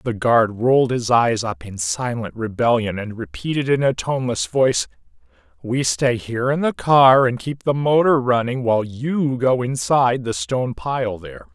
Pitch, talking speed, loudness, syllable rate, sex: 120 Hz, 175 wpm, -19 LUFS, 4.8 syllables/s, male